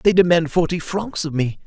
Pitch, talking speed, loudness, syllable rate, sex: 170 Hz, 215 wpm, -19 LUFS, 5.3 syllables/s, male